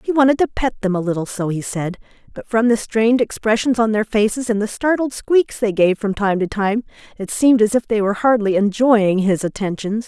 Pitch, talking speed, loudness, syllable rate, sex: 215 Hz, 225 wpm, -18 LUFS, 5.6 syllables/s, female